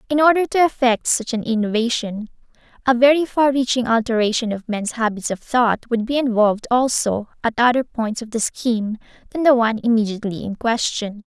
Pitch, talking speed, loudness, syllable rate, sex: 235 Hz, 175 wpm, -19 LUFS, 5.6 syllables/s, female